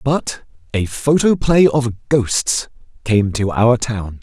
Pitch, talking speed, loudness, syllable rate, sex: 120 Hz, 130 wpm, -17 LUFS, 3.1 syllables/s, male